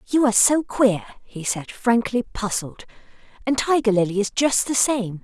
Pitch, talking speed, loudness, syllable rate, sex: 230 Hz, 170 wpm, -21 LUFS, 4.5 syllables/s, female